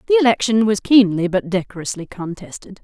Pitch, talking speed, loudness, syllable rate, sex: 205 Hz, 150 wpm, -17 LUFS, 5.8 syllables/s, female